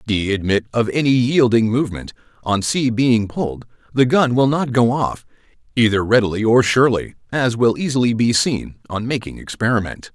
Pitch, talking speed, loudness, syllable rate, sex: 120 Hz, 170 wpm, -18 LUFS, 5.3 syllables/s, male